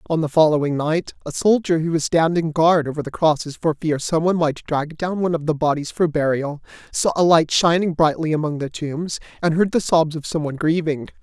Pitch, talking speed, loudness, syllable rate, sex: 160 Hz, 215 wpm, -20 LUFS, 5.5 syllables/s, male